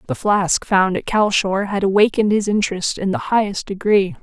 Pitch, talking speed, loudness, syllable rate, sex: 200 Hz, 185 wpm, -18 LUFS, 5.2 syllables/s, female